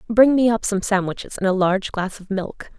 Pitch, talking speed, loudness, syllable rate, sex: 205 Hz, 235 wpm, -20 LUFS, 5.5 syllables/s, female